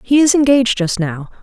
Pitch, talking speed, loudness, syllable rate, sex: 230 Hz, 210 wpm, -14 LUFS, 5.7 syllables/s, female